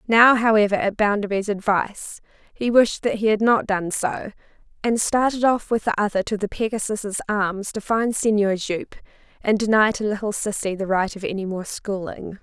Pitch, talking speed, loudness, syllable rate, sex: 210 Hz, 180 wpm, -21 LUFS, 4.9 syllables/s, female